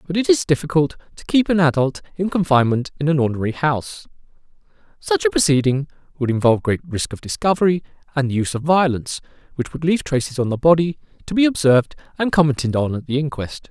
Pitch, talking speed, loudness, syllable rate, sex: 150 Hz, 195 wpm, -19 LUFS, 6.7 syllables/s, male